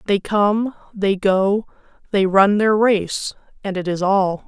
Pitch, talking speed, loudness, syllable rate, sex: 200 Hz, 160 wpm, -18 LUFS, 3.6 syllables/s, female